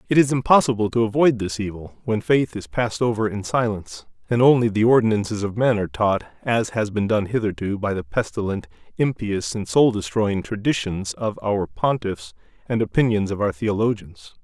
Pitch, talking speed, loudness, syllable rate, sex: 105 Hz, 180 wpm, -21 LUFS, 5.4 syllables/s, male